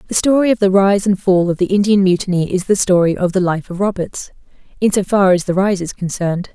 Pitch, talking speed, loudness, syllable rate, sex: 190 Hz, 240 wpm, -15 LUFS, 6.0 syllables/s, female